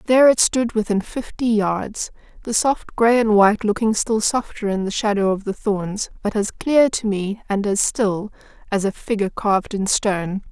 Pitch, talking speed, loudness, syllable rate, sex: 210 Hz, 185 wpm, -20 LUFS, 4.8 syllables/s, female